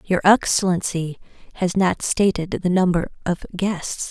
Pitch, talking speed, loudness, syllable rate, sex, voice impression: 180 Hz, 130 wpm, -20 LUFS, 4.2 syllables/s, female, feminine, adult-like, slightly soft, slightly cute, calm, friendly, slightly reassuring, slightly sweet, slightly kind